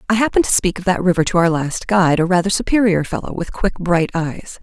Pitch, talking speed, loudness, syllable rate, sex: 180 Hz, 245 wpm, -17 LUFS, 6.1 syllables/s, female